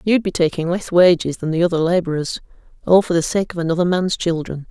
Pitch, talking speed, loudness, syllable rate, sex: 175 Hz, 205 wpm, -18 LUFS, 6.1 syllables/s, female